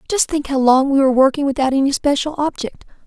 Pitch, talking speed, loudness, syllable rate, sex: 275 Hz, 215 wpm, -16 LUFS, 6.3 syllables/s, female